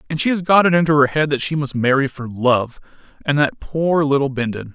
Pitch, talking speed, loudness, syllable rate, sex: 145 Hz, 240 wpm, -18 LUFS, 5.7 syllables/s, male